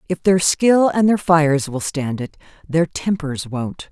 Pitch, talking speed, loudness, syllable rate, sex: 160 Hz, 185 wpm, -18 LUFS, 4.1 syllables/s, female